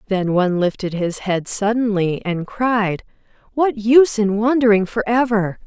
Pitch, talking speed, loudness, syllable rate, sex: 210 Hz, 140 wpm, -18 LUFS, 4.5 syllables/s, female